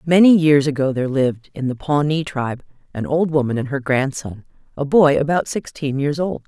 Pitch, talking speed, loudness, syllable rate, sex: 145 Hz, 195 wpm, -18 LUFS, 5.4 syllables/s, female